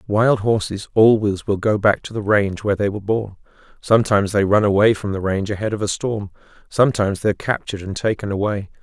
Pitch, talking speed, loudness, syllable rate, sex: 105 Hz, 210 wpm, -19 LUFS, 6.5 syllables/s, male